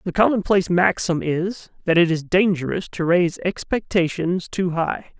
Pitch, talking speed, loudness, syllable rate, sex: 180 Hz, 150 wpm, -20 LUFS, 4.7 syllables/s, male